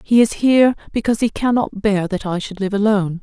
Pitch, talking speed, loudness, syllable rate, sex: 210 Hz, 225 wpm, -17 LUFS, 6.1 syllables/s, female